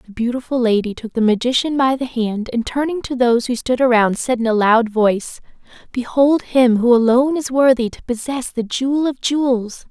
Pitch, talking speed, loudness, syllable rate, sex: 245 Hz, 200 wpm, -17 LUFS, 5.3 syllables/s, female